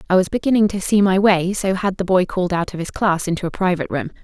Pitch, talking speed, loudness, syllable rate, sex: 185 Hz, 285 wpm, -18 LUFS, 6.6 syllables/s, female